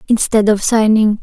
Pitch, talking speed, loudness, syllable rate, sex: 215 Hz, 145 wpm, -13 LUFS, 4.7 syllables/s, female